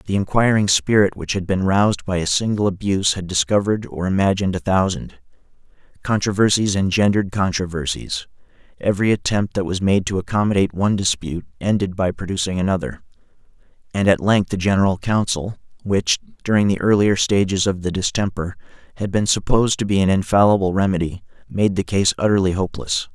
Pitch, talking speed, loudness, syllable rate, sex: 95 Hz, 155 wpm, -19 LUFS, 6.1 syllables/s, male